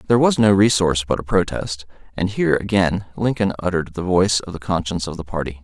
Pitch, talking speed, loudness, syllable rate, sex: 90 Hz, 215 wpm, -19 LUFS, 6.5 syllables/s, male